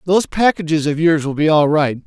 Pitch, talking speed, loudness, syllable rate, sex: 160 Hz, 230 wpm, -16 LUFS, 5.9 syllables/s, male